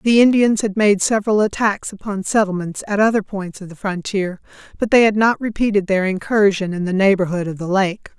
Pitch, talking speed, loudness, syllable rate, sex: 200 Hz, 200 wpm, -18 LUFS, 5.5 syllables/s, female